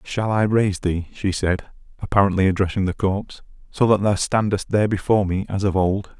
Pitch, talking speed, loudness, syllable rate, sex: 100 Hz, 195 wpm, -21 LUFS, 5.7 syllables/s, male